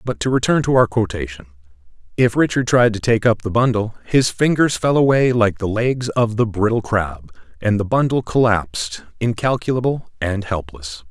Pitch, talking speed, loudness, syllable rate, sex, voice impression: 110 Hz, 175 wpm, -18 LUFS, 5.0 syllables/s, male, masculine, adult-like, tensed, powerful, clear, fluent, raspy, cool, intellectual, mature, friendly, wild, lively, slightly strict